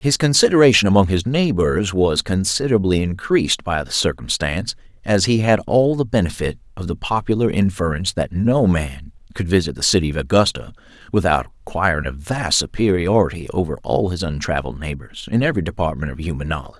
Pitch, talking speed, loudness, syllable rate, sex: 95 Hz, 165 wpm, -19 LUFS, 5.9 syllables/s, male